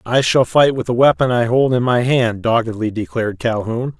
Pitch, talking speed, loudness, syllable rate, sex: 120 Hz, 210 wpm, -16 LUFS, 5.2 syllables/s, male